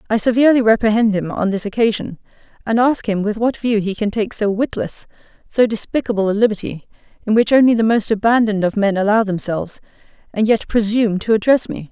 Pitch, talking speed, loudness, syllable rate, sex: 215 Hz, 190 wpm, -17 LUFS, 6.1 syllables/s, female